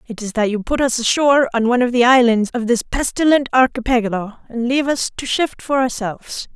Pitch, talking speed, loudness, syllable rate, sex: 245 Hz, 210 wpm, -17 LUFS, 6.0 syllables/s, female